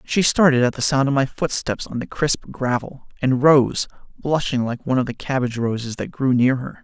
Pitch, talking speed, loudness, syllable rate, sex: 130 Hz, 220 wpm, -20 LUFS, 5.3 syllables/s, male